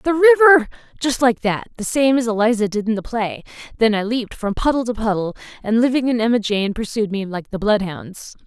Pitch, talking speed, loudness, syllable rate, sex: 225 Hz, 205 wpm, -18 LUFS, 5.8 syllables/s, female